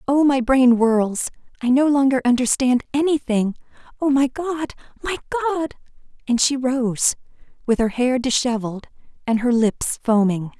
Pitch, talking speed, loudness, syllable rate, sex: 255 Hz, 140 wpm, -20 LUFS, 4.6 syllables/s, female